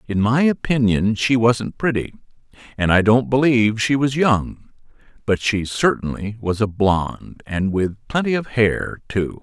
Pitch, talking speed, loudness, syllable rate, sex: 115 Hz, 160 wpm, -19 LUFS, 4.3 syllables/s, male